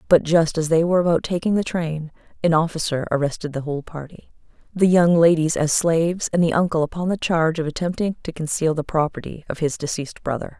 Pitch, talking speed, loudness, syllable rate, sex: 165 Hz, 205 wpm, -21 LUFS, 6.1 syllables/s, female